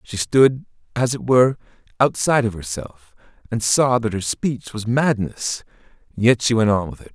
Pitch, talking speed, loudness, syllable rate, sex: 115 Hz, 175 wpm, -19 LUFS, 4.8 syllables/s, male